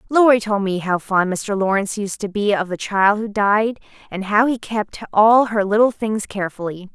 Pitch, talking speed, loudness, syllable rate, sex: 205 Hz, 205 wpm, -18 LUFS, 4.9 syllables/s, female